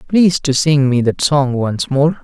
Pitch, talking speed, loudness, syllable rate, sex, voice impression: 140 Hz, 215 wpm, -14 LUFS, 4.4 syllables/s, male, masculine, adult-like, tensed, slightly powerful, slightly bright, clear, slightly halting, intellectual, calm, friendly, slightly reassuring, lively, slightly kind